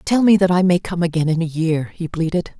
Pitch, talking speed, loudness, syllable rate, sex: 170 Hz, 255 wpm, -18 LUFS, 5.7 syllables/s, female